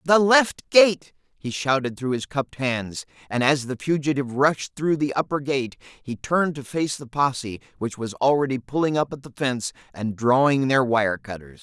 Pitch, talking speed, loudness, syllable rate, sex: 135 Hz, 185 wpm, -23 LUFS, 5.0 syllables/s, male